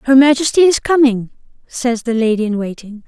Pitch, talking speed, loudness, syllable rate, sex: 245 Hz, 175 wpm, -14 LUFS, 5.5 syllables/s, female